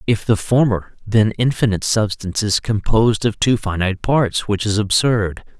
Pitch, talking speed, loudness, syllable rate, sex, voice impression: 105 Hz, 160 wpm, -18 LUFS, 5.0 syllables/s, male, very masculine, very adult-like, very middle-aged, very thick, very tensed, very powerful, bright, soft, very clear, very fluent, slightly raspy, very cool, very intellectual, slightly refreshing, very sincere, calm, very mature, very friendly, very reassuring, very unique, elegant, slightly wild, very sweet, very lively, very kind, slightly modest